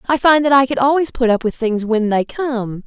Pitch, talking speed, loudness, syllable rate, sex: 245 Hz, 270 wpm, -16 LUFS, 5.2 syllables/s, female